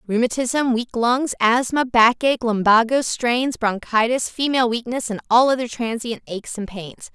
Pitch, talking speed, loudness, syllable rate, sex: 240 Hz, 145 wpm, -19 LUFS, 4.7 syllables/s, female